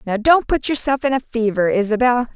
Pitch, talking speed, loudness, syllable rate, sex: 240 Hz, 205 wpm, -17 LUFS, 5.6 syllables/s, female